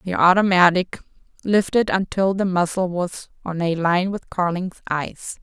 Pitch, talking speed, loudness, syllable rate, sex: 180 Hz, 145 wpm, -20 LUFS, 4.3 syllables/s, female